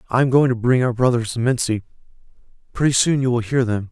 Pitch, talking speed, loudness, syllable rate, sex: 120 Hz, 230 wpm, -19 LUFS, 6.4 syllables/s, male